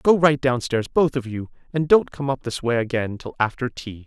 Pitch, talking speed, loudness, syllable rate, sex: 130 Hz, 250 wpm, -22 LUFS, 5.1 syllables/s, male